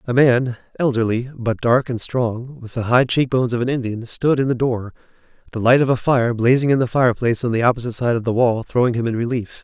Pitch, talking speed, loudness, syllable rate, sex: 120 Hz, 245 wpm, -19 LUFS, 6.0 syllables/s, male